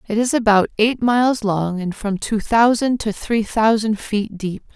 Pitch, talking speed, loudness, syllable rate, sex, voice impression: 220 Hz, 190 wpm, -18 LUFS, 4.2 syllables/s, female, feminine, adult-like, tensed, soft, slightly halting, calm, friendly, reassuring, elegant, kind